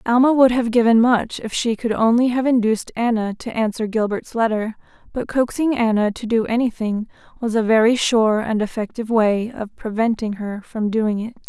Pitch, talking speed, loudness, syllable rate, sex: 225 Hz, 185 wpm, -19 LUFS, 5.3 syllables/s, female